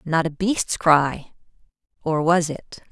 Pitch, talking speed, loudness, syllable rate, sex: 165 Hz, 125 wpm, -21 LUFS, 3.5 syllables/s, female